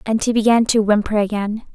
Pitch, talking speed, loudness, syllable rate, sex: 215 Hz, 205 wpm, -17 LUFS, 5.7 syllables/s, female